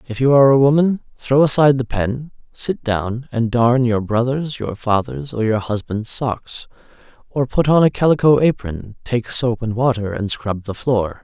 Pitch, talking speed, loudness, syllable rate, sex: 120 Hz, 185 wpm, -18 LUFS, 4.6 syllables/s, male